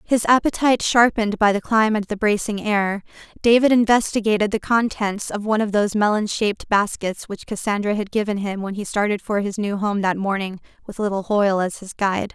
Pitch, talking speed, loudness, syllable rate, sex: 210 Hz, 200 wpm, -20 LUFS, 5.7 syllables/s, female